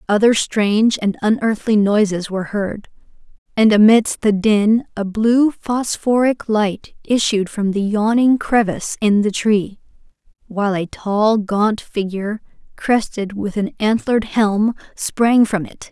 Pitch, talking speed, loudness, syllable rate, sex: 215 Hz, 135 wpm, -17 LUFS, 4.1 syllables/s, female